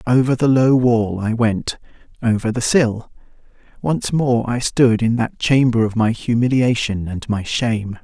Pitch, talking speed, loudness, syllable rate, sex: 115 Hz, 155 wpm, -18 LUFS, 4.4 syllables/s, male